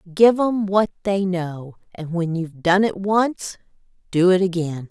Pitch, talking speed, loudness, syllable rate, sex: 185 Hz, 170 wpm, -20 LUFS, 4.2 syllables/s, female